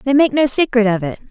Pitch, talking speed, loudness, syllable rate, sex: 245 Hz, 275 wpm, -15 LUFS, 6.4 syllables/s, female